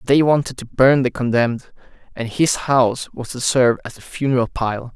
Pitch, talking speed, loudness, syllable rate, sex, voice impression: 125 Hz, 195 wpm, -18 LUFS, 5.3 syllables/s, male, masculine, adult-like, slightly refreshing, slightly sincere, slightly unique